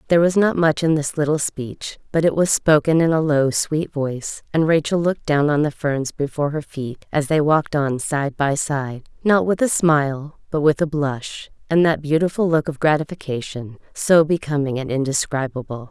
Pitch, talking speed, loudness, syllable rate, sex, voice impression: 150 Hz, 195 wpm, -20 LUFS, 5.0 syllables/s, female, feminine, middle-aged, tensed, powerful, slightly soft, slightly muffled, slightly raspy, intellectual, calm, reassuring, elegant, lively, slightly strict, slightly sharp